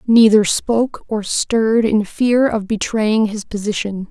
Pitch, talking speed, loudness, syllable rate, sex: 215 Hz, 145 wpm, -16 LUFS, 4.1 syllables/s, female